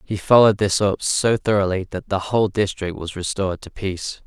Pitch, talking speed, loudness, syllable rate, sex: 100 Hz, 195 wpm, -20 LUFS, 5.6 syllables/s, male